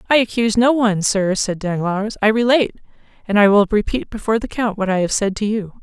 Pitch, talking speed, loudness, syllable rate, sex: 210 Hz, 225 wpm, -17 LUFS, 6.2 syllables/s, female